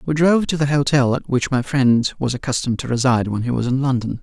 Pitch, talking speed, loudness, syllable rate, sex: 130 Hz, 255 wpm, -19 LUFS, 6.4 syllables/s, male